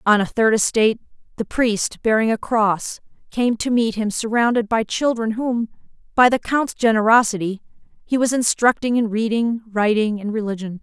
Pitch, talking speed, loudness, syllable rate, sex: 225 Hz, 160 wpm, -19 LUFS, 4.9 syllables/s, female